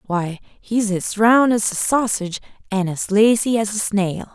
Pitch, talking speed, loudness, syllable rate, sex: 210 Hz, 180 wpm, -19 LUFS, 4.2 syllables/s, female